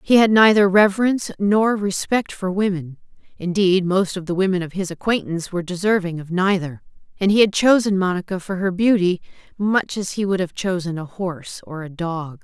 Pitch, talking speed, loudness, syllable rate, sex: 190 Hz, 180 wpm, -19 LUFS, 5.4 syllables/s, female